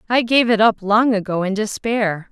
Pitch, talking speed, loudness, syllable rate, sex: 215 Hz, 210 wpm, -17 LUFS, 4.7 syllables/s, female